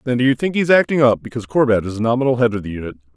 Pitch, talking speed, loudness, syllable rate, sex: 120 Hz, 305 wpm, -17 LUFS, 8.1 syllables/s, male